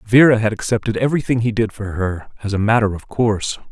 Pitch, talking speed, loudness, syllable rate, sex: 110 Hz, 210 wpm, -18 LUFS, 6.2 syllables/s, male